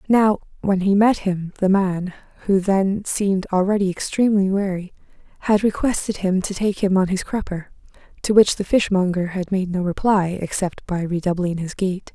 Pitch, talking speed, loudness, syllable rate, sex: 190 Hz, 175 wpm, -20 LUFS, 5.0 syllables/s, female